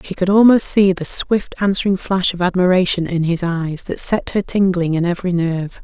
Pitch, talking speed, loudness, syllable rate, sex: 180 Hz, 205 wpm, -16 LUFS, 5.3 syllables/s, female